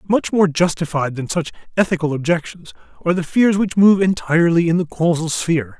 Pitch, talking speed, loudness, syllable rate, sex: 170 Hz, 175 wpm, -17 LUFS, 5.8 syllables/s, male